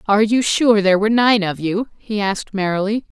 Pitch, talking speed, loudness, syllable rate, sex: 210 Hz, 205 wpm, -17 LUFS, 5.9 syllables/s, female